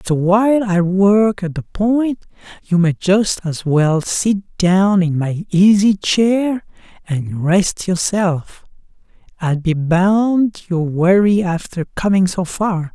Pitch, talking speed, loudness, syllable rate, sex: 185 Hz, 140 wpm, -16 LUFS, 3.4 syllables/s, male